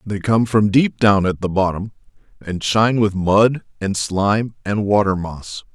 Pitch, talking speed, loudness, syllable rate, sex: 100 Hz, 175 wpm, -18 LUFS, 4.4 syllables/s, male